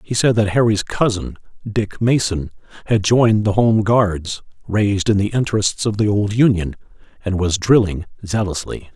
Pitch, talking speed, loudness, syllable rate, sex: 105 Hz, 160 wpm, -18 LUFS, 4.8 syllables/s, male